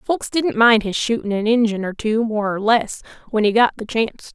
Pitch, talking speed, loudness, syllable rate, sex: 225 Hz, 235 wpm, -18 LUFS, 5.1 syllables/s, female